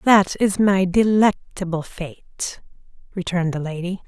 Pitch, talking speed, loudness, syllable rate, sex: 185 Hz, 120 wpm, -20 LUFS, 4.2 syllables/s, female